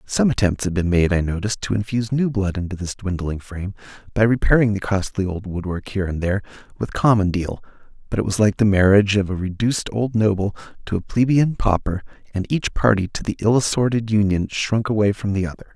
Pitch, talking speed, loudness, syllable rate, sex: 100 Hz, 215 wpm, -20 LUFS, 6.1 syllables/s, male